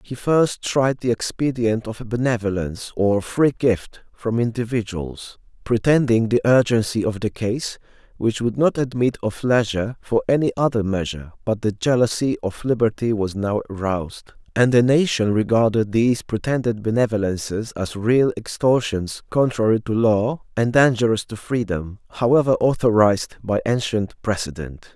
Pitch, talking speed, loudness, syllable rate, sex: 115 Hz, 140 wpm, -20 LUFS, 4.9 syllables/s, male